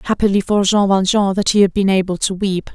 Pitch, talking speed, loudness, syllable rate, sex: 195 Hz, 240 wpm, -16 LUFS, 5.8 syllables/s, female